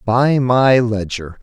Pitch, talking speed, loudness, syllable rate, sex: 120 Hz, 125 wpm, -15 LUFS, 3.0 syllables/s, male